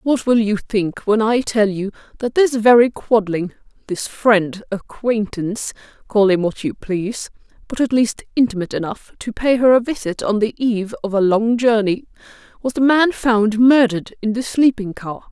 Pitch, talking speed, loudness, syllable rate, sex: 220 Hz, 170 wpm, -17 LUFS, 4.8 syllables/s, female